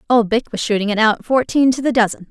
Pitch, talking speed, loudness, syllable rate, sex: 225 Hz, 260 wpm, -16 LUFS, 6.2 syllables/s, female